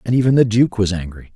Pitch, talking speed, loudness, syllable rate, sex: 110 Hz, 265 wpm, -16 LUFS, 6.4 syllables/s, male